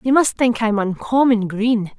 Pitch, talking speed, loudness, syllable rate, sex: 225 Hz, 180 wpm, -18 LUFS, 4.4 syllables/s, female